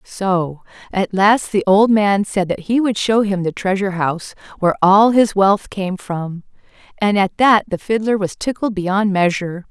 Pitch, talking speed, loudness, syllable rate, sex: 200 Hz, 185 wpm, -16 LUFS, 4.5 syllables/s, female